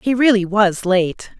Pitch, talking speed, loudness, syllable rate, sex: 205 Hz, 170 wpm, -16 LUFS, 4.0 syllables/s, female